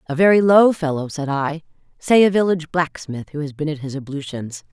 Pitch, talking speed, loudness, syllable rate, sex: 155 Hz, 205 wpm, -19 LUFS, 5.6 syllables/s, female